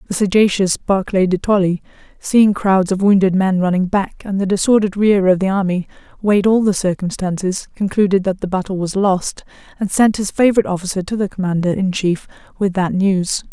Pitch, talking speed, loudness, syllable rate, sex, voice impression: 195 Hz, 185 wpm, -16 LUFS, 5.6 syllables/s, female, very feminine, adult-like, slightly middle-aged, slightly thin, slightly relaxed, weak, dark, hard, muffled, very fluent, cute, slightly cool, very intellectual, sincere, calm, friendly, reassuring, very unique, elegant, slightly wild, sweet, kind, very modest